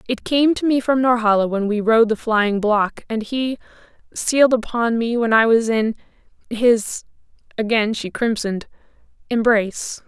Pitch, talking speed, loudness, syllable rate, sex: 230 Hz, 130 wpm, -18 LUFS, 4.6 syllables/s, female